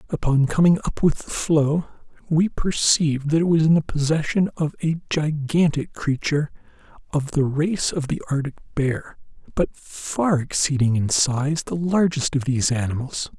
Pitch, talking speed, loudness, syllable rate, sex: 150 Hz, 155 wpm, -22 LUFS, 4.5 syllables/s, male